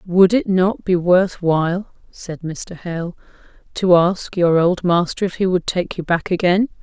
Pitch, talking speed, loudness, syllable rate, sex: 180 Hz, 185 wpm, -18 LUFS, 4.1 syllables/s, female